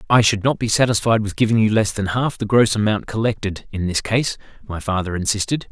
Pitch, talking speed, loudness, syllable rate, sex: 110 Hz, 210 wpm, -19 LUFS, 5.7 syllables/s, male